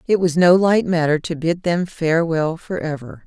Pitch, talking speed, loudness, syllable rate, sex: 170 Hz, 185 wpm, -18 LUFS, 4.8 syllables/s, female